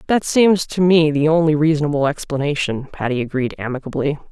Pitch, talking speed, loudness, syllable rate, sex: 150 Hz, 155 wpm, -18 LUFS, 5.8 syllables/s, female